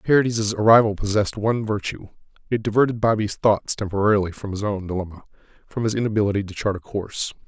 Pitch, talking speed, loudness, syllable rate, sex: 105 Hz, 170 wpm, -22 LUFS, 6.7 syllables/s, male